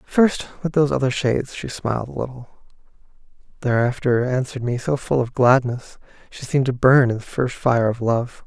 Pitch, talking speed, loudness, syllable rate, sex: 130 Hz, 185 wpm, -20 LUFS, 5.3 syllables/s, male